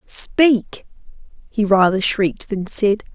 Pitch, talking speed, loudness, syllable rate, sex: 210 Hz, 115 wpm, -17 LUFS, 3.5 syllables/s, female